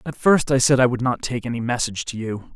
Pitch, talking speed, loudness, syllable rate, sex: 125 Hz, 280 wpm, -20 LUFS, 6.2 syllables/s, male